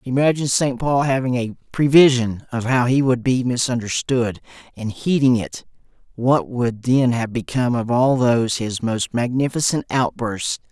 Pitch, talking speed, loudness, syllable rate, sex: 125 Hz, 145 wpm, -19 LUFS, 4.7 syllables/s, male